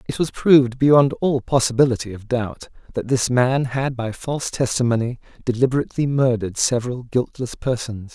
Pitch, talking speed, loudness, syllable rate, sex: 125 Hz, 145 wpm, -20 LUFS, 5.4 syllables/s, male